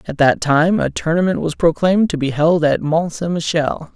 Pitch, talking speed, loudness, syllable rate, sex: 160 Hz, 210 wpm, -17 LUFS, 5.0 syllables/s, male